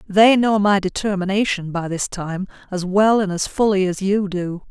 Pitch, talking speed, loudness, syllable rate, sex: 195 Hz, 190 wpm, -19 LUFS, 4.7 syllables/s, female